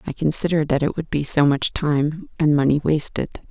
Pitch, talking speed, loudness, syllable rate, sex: 155 Hz, 205 wpm, -20 LUFS, 5.4 syllables/s, female